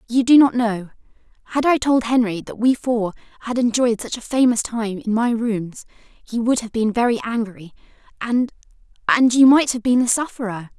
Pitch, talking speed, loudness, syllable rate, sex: 230 Hz, 180 wpm, -19 LUFS, 4.9 syllables/s, female